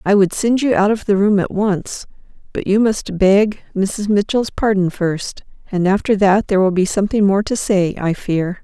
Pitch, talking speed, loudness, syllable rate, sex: 200 Hz, 210 wpm, -16 LUFS, 4.7 syllables/s, female